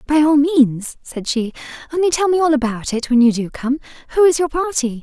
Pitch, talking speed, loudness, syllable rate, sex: 280 Hz, 225 wpm, -17 LUFS, 5.5 syllables/s, female